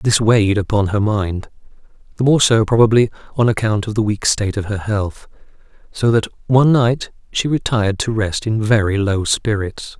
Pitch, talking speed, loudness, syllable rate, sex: 110 Hz, 180 wpm, -17 LUFS, 5.1 syllables/s, male